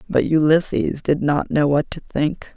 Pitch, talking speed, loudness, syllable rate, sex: 150 Hz, 190 wpm, -19 LUFS, 4.4 syllables/s, female